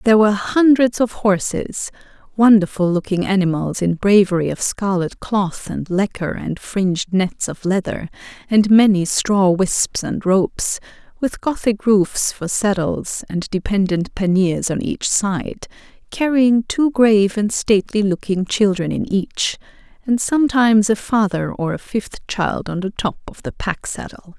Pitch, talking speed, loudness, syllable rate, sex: 200 Hz, 150 wpm, -18 LUFS, 4.4 syllables/s, female